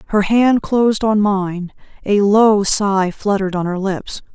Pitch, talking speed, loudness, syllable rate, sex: 205 Hz, 165 wpm, -16 LUFS, 4.1 syllables/s, female